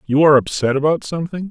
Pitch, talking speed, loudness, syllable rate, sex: 150 Hz, 200 wpm, -16 LUFS, 7.2 syllables/s, male